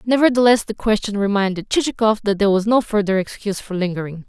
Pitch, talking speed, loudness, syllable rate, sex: 210 Hz, 180 wpm, -18 LUFS, 6.6 syllables/s, female